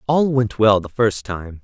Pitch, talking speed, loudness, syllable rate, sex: 115 Hz, 220 wpm, -18 LUFS, 4.1 syllables/s, male